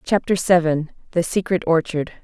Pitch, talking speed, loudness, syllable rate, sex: 170 Hz, 135 wpm, -20 LUFS, 5.0 syllables/s, female